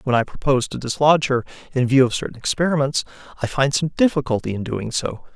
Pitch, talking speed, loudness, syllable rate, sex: 135 Hz, 200 wpm, -20 LUFS, 6.3 syllables/s, male